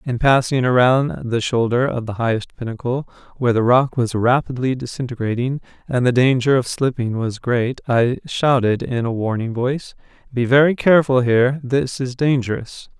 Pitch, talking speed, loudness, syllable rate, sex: 125 Hz, 160 wpm, -18 LUFS, 5.0 syllables/s, male